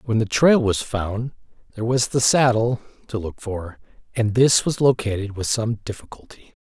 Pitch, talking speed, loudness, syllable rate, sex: 115 Hz, 170 wpm, -21 LUFS, 4.8 syllables/s, male